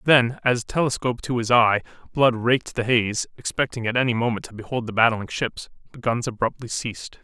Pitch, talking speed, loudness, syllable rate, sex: 115 Hz, 190 wpm, -22 LUFS, 5.6 syllables/s, male